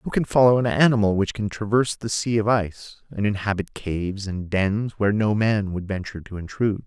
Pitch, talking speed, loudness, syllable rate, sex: 105 Hz, 210 wpm, -22 LUFS, 5.6 syllables/s, male